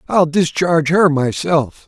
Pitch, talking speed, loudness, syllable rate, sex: 160 Hz, 130 wpm, -15 LUFS, 4.1 syllables/s, male